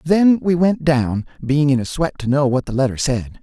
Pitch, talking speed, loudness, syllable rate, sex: 140 Hz, 245 wpm, -18 LUFS, 5.1 syllables/s, male